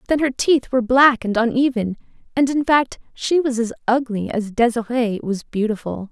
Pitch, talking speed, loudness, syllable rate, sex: 240 Hz, 175 wpm, -19 LUFS, 5.0 syllables/s, female